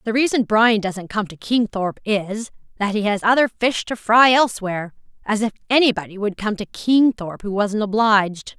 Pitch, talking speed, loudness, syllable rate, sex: 215 Hz, 180 wpm, -19 LUFS, 5.3 syllables/s, female